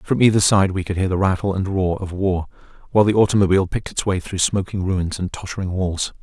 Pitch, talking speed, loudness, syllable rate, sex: 95 Hz, 230 wpm, -20 LUFS, 6.2 syllables/s, male